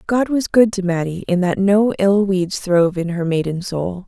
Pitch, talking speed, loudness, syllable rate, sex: 190 Hz, 220 wpm, -17 LUFS, 4.7 syllables/s, female